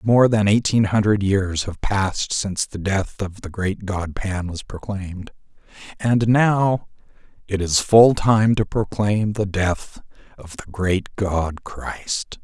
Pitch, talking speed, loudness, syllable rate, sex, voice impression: 100 Hz, 155 wpm, -20 LUFS, 3.6 syllables/s, male, masculine, middle-aged, clear, fluent, slightly raspy, cool, sincere, slightly mature, friendly, wild, lively, kind